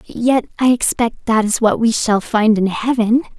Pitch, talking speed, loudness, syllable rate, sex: 230 Hz, 195 wpm, -16 LUFS, 4.3 syllables/s, female